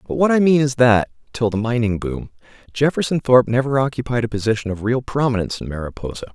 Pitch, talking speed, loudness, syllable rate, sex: 120 Hz, 200 wpm, -19 LUFS, 6.6 syllables/s, male